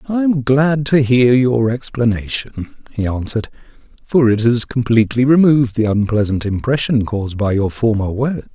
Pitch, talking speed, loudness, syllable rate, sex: 120 Hz, 155 wpm, -16 LUFS, 5.0 syllables/s, male